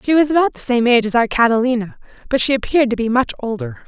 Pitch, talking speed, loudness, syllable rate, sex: 250 Hz, 250 wpm, -16 LUFS, 7.2 syllables/s, female